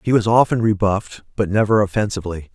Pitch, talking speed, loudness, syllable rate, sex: 105 Hz, 165 wpm, -18 LUFS, 6.5 syllables/s, male